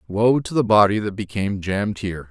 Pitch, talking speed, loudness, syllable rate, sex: 105 Hz, 210 wpm, -20 LUFS, 6.1 syllables/s, male